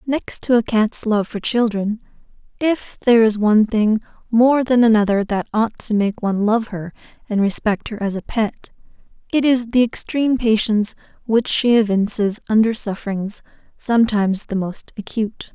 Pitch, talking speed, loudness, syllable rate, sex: 220 Hz, 160 wpm, -18 LUFS, 5.0 syllables/s, female